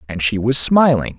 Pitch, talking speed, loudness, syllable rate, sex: 120 Hz, 200 wpm, -15 LUFS, 4.9 syllables/s, male